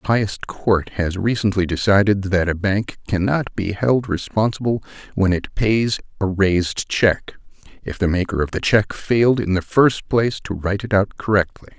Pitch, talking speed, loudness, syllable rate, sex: 100 Hz, 180 wpm, -19 LUFS, 4.8 syllables/s, male